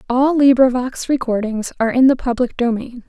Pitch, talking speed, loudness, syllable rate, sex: 250 Hz, 155 wpm, -16 LUFS, 5.4 syllables/s, female